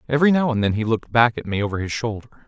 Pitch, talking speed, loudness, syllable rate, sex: 115 Hz, 290 wpm, -20 LUFS, 8.0 syllables/s, male